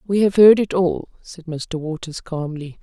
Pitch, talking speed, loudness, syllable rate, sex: 175 Hz, 190 wpm, -18 LUFS, 4.3 syllables/s, female